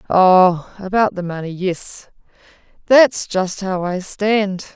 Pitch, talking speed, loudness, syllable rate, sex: 195 Hz, 115 wpm, -17 LUFS, 3.4 syllables/s, female